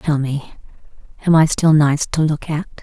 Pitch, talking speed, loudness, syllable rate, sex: 150 Hz, 190 wpm, -17 LUFS, 4.6 syllables/s, female